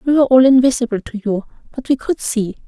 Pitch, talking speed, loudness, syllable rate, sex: 245 Hz, 225 wpm, -16 LUFS, 6.4 syllables/s, female